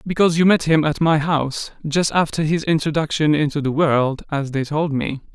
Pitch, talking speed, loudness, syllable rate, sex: 155 Hz, 200 wpm, -19 LUFS, 5.3 syllables/s, male